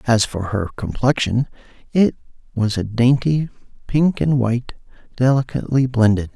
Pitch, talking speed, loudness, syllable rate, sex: 125 Hz, 125 wpm, -19 LUFS, 4.9 syllables/s, male